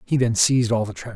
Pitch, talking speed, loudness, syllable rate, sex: 120 Hz, 310 wpm, -20 LUFS, 6.5 syllables/s, male